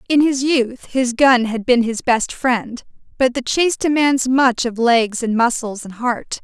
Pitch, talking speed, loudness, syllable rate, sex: 250 Hz, 195 wpm, -17 LUFS, 4.1 syllables/s, female